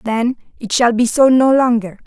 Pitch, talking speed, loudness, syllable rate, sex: 240 Hz, 205 wpm, -14 LUFS, 4.8 syllables/s, female